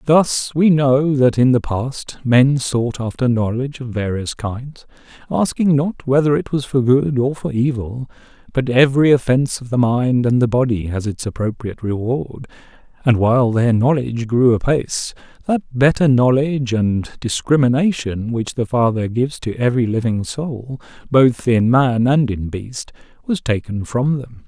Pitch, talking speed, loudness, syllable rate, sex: 125 Hz, 160 wpm, -17 LUFS, 4.6 syllables/s, male